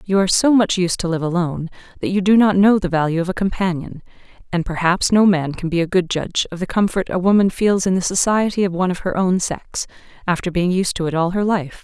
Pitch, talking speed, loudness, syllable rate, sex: 185 Hz, 255 wpm, -18 LUFS, 6.1 syllables/s, female